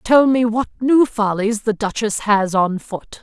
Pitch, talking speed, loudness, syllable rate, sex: 220 Hz, 185 wpm, -17 LUFS, 3.9 syllables/s, female